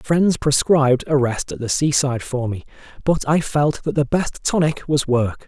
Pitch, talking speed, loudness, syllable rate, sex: 145 Hz, 195 wpm, -19 LUFS, 4.7 syllables/s, male